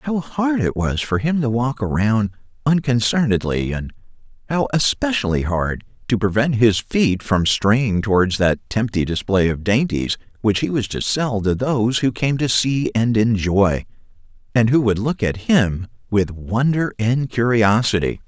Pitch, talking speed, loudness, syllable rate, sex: 115 Hz, 160 wpm, -19 LUFS, 4.3 syllables/s, male